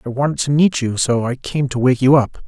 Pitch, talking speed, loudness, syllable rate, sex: 130 Hz, 290 wpm, -17 LUFS, 5.6 syllables/s, male